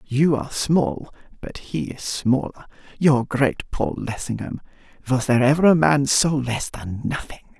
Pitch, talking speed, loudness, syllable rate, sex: 130 Hz, 140 wpm, -21 LUFS, 4.5 syllables/s, male